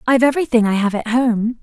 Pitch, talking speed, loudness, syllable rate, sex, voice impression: 235 Hz, 220 wpm, -16 LUFS, 6.8 syllables/s, female, feminine, adult-like, slightly soft, sincere, slightly calm, slightly friendly, slightly kind